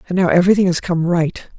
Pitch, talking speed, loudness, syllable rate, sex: 175 Hz, 230 wpm, -16 LUFS, 6.6 syllables/s, female